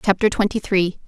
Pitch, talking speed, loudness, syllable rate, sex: 195 Hz, 165 wpm, -20 LUFS, 5.4 syllables/s, female